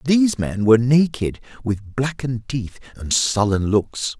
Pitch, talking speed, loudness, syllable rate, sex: 120 Hz, 145 wpm, -20 LUFS, 4.4 syllables/s, male